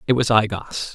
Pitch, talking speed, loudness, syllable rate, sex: 115 Hz, 255 wpm, -20 LUFS, 5.1 syllables/s, male